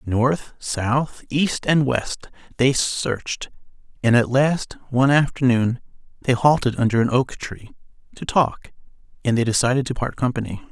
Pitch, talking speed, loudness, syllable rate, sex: 130 Hz, 145 wpm, -21 LUFS, 4.4 syllables/s, male